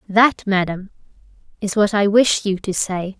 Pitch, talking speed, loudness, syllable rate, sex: 200 Hz, 170 wpm, -18 LUFS, 4.4 syllables/s, female